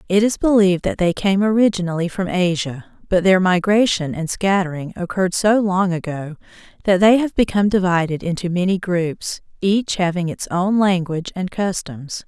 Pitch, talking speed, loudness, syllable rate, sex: 185 Hz, 160 wpm, -18 LUFS, 5.1 syllables/s, female